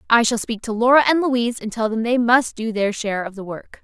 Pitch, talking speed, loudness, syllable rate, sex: 230 Hz, 280 wpm, -19 LUFS, 5.9 syllables/s, female